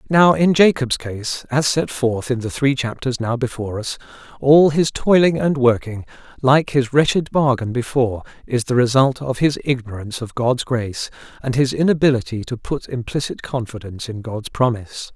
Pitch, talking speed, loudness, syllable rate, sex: 130 Hz, 170 wpm, -19 LUFS, 5.1 syllables/s, male